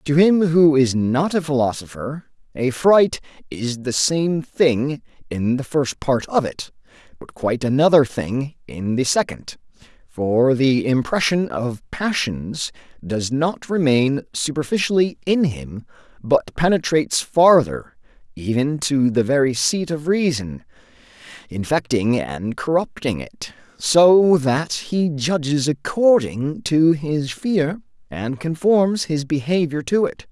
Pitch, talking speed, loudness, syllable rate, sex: 140 Hz, 130 wpm, -19 LUFS, 3.8 syllables/s, male